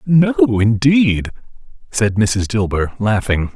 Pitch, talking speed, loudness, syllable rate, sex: 115 Hz, 100 wpm, -16 LUFS, 3.3 syllables/s, male